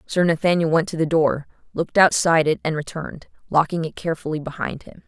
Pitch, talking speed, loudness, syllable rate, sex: 160 Hz, 190 wpm, -21 LUFS, 6.3 syllables/s, female